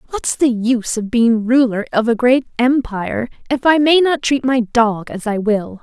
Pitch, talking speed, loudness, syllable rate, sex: 240 Hz, 205 wpm, -16 LUFS, 4.6 syllables/s, female